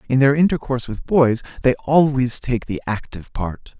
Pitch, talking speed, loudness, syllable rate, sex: 130 Hz, 175 wpm, -19 LUFS, 5.1 syllables/s, male